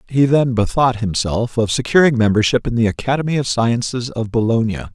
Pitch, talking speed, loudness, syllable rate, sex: 120 Hz, 170 wpm, -17 LUFS, 5.6 syllables/s, male